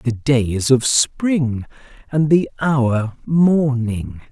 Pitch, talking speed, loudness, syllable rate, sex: 130 Hz, 125 wpm, -17 LUFS, 2.8 syllables/s, male